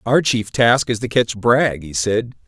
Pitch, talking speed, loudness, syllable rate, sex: 115 Hz, 220 wpm, -17 LUFS, 4.0 syllables/s, male